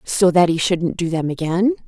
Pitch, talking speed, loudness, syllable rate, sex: 180 Hz, 225 wpm, -18 LUFS, 4.8 syllables/s, female